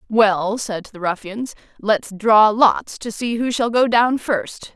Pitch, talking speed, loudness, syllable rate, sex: 220 Hz, 175 wpm, -18 LUFS, 3.5 syllables/s, female